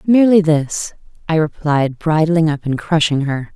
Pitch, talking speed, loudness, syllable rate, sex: 160 Hz, 150 wpm, -16 LUFS, 4.5 syllables/s, female